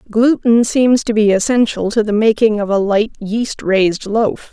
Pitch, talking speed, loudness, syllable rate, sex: 220 Hz, 185 wpm, -14 LUFS, 4.5 syllables/s, female